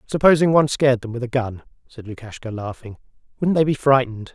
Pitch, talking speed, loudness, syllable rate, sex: 125 Hz, 195 wpm, -19 LUFS, 6.5 syllables/s, male